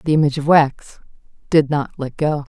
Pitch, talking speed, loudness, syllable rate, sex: 145 Hz, 190 wpm, -18 LUFS, 5.3 syllables/s, female